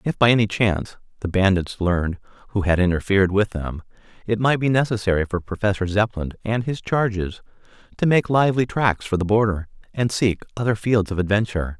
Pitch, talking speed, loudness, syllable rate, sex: 105 Hz, 180 wpm, -21 LUFS, 5.8 syllables/s, male